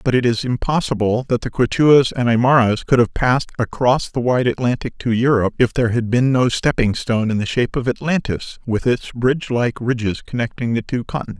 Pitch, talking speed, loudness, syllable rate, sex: 120 Hz, 205 wpm, -18 LUFS, 5.8 syllables/s, male